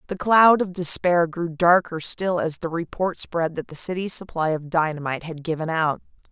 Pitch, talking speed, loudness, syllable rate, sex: 170 Hz, 190 wpm, -22 LUFS, 5.0 syllables/s, female